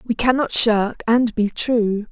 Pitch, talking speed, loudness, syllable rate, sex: 225 Hz, 170 wpm, -18 LUFS, 3.7 syllables/s, female